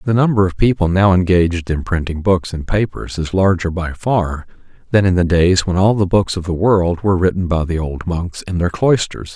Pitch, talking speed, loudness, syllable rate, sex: 90 Hz, 225 wpm, -16 LUFS, 5.2 syllables/s, male